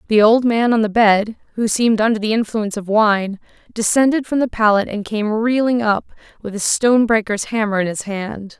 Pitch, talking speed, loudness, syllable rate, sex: 220 Hz, 200 wpm, -17 LUFS, 5.3 syllables/s, female